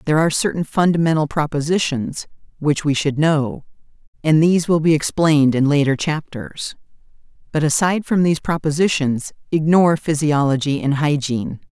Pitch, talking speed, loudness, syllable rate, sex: 150 Hz, 135 wpm, -18 LUFS, 5.4 syllables/s, female